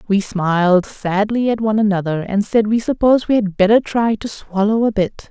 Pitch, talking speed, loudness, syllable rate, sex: 210 Hz, 205 wpm, -16 LUFS, 5.2 syllables/s, female